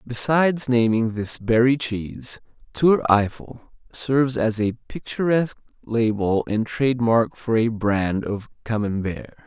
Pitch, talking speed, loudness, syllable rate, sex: 115 Hz, 120 wpm, -21 LUFS, 4.1 syllables/s, male